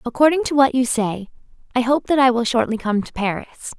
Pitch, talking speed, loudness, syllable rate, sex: 250 Hz, 220 wpm, -19 LUFS, 5.6 syllables/s, female